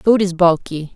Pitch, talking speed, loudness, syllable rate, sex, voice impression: 180 Hz, 190 wpm, -15 LUFS, 4.4 syllables/s, female, feminine, slightly gender-neutral, slightly adult-like, slightly middle-aged, slightly thin, slightly relaxed, slightly weak, dark, hard, slightly clear, fluent, slightly cute, intellectual, slightly refreshing, slightly sincere, calm, slightly friendly, very unique, elegant, kind, modest